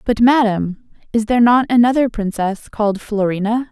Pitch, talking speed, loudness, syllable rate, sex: 225 Hz, 145 wpm, -16 LUFS, 5.2 syllables/s, female